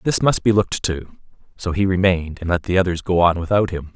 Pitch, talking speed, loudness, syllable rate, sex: 90 Hz, 245 wpm, -19 LUFS, 6.2 syllables/s, male